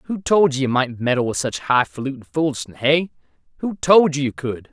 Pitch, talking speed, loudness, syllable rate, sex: 140 Hz, 205 wpm, -19 LUFS, 5.0 syllables/s, male